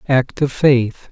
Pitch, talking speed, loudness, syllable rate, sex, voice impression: 130 Hz, 160 wpm, -16 LUFS, 3.2 syllables/s, male, very masculine, very middle-aged, very thick, slightly tensed, powerful, slightly bright, slightly soft, clear, fluent, slightly raspy, slightly cool, intellectual, slightly refreshing, sincere, very calm, mature, friendly, reassuring, slightly unique, elegant, slightly wild, sweet, slightly lively, kind, modest